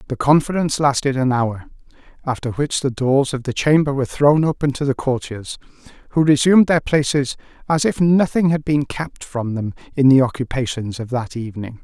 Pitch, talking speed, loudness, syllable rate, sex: 135 Hz, 185 wpm, -18 LUFS, 5.4 syllables/s, male